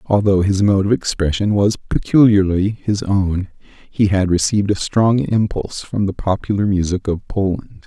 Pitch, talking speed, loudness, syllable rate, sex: 100 Hz, 160 wpm, -17 LUFS, 4.8 syllables/s, male